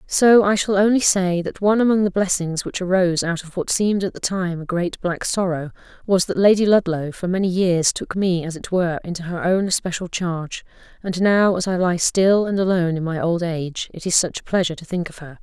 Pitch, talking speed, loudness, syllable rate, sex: 180 Hz, 235 wpm, -20 LUFS, 5.7 syllables/s, female